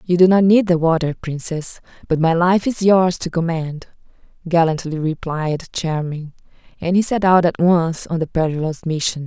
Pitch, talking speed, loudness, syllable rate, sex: 170 Hz, 175 wpm, -18 LUFS, 4.8 syllables/s, female